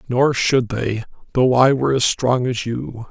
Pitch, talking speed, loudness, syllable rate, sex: 125 Hz, 195 wpm, -18 LUFS, 4.2 syllables/s, male